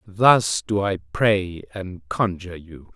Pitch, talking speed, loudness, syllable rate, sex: 95 Hz, 140 wpm, -21 LUFS, 3.3 syllables/s, male